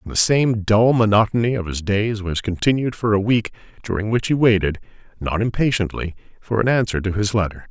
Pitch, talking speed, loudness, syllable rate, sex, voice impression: 105 Hz, 195 wpm, -19 LUFS, 5.6 syllables/s, male, masculine, very adult-like, very middle-aged, very thick, slightly tensed, powerful, slightly bright, slightly soft, slightly muffled, fluent, slightly raspy, very cool, very intellectual, sincere, calm, very mature, friendly, reassuring, very unique, slightly elegant, very wild, sweet, slightly lively, kind, slightly intense